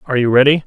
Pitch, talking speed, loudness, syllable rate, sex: 135 Hz, 270 wpm, -13 LUFS, 8.8 syllables/s, male